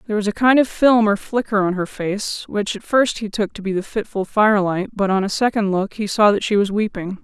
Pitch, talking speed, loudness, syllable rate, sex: 205 Hz, 265 wpm, -19 LUFS, 5.6 syllables/s, female